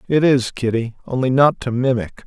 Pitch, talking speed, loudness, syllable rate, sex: 125 Hz, 185 wpm, -18 LUFS, 5.0 syllables/s, male